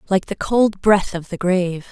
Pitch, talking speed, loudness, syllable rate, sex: 190 Hz, 220 wpm, -19 LUFS, 4.7 syllables/s, female